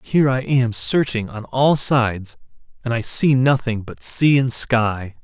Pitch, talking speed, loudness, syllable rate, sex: 120 Hz, 170 wpm, -18 LUFS, 4.1 syllables/s, male